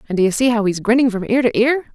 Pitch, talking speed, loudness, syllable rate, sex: 230 Hz, 340 wpm, -16 LUFS, 7.1 syllables/s, female